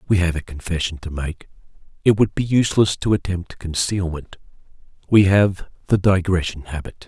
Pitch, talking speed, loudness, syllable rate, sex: 90 Hz, 135 wpm, -20 LUFS, 5.1 syllables/s, male